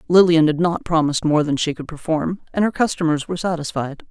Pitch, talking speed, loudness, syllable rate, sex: 160 Hz, 205 wpm, -19 LUFS, 6.1 syllables/s, female